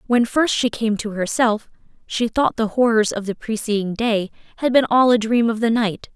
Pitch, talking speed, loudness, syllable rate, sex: 225 Hz, 215 wpm, -19 LUFS, 4.9 syllables/s, female